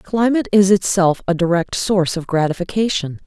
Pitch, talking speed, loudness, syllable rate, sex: 185 Hz, 145 wpm, -17 LUFS, 5.5 syllables/s, female